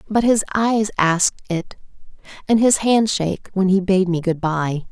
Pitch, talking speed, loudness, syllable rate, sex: 195 Hz, 160 wpm, -18 LUFS, 4.6 syllables/s, female